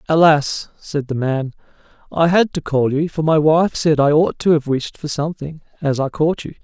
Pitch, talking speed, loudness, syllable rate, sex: 150 Hz, 215 wpm, -17 LUFS, 4.9 syllables/s, male